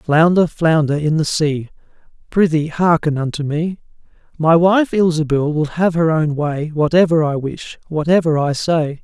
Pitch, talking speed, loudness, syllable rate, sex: 160 Hz, 155 wpm, -16 LUFS, 4.4 syllables/s, male